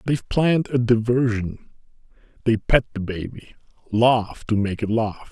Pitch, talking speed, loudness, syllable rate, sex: 115 Hz, 145 wpm, -22 LUFS, 5.0 syllables/s, male